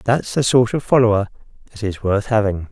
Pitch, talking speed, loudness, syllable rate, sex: 110 Hz, 200 wpm, -18 LUFS, 5.6 syllables/s, male